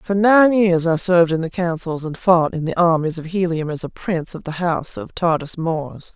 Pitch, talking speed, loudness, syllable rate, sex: 170 Hz, 235 wpm, -19 LUFS, 5.1 syllables/s, female